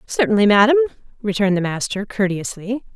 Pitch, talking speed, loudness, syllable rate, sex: 215 Hz, 120 wpm, -18 LUFS, 6.1 syllables/s, female